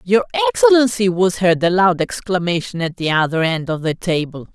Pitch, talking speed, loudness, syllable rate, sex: 190 Hz, 185 wpm, -17 LUFS, 5.3 syllables/s, female